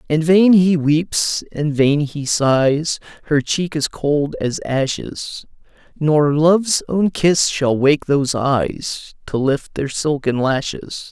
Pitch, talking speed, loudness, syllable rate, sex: 150 Hz, 145 wpm, -17 LUFS, 3.2 syllables/s, male